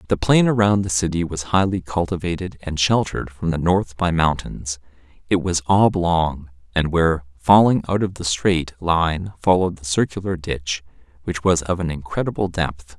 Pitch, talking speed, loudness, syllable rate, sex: 85 Hz, 165 wpm, -20 LUFS, 4.9 syllables/s, male